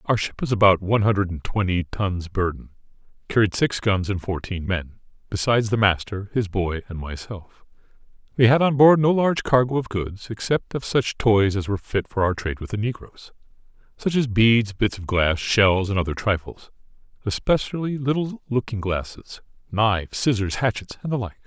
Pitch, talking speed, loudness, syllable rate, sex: 105 Hz, 180 wpm, -22 LUFS, 5.1 syllables/s, male